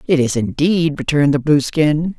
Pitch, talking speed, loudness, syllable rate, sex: 150 Hz, 165 wpm, -16 LUFS, 5.0 syllables/s, female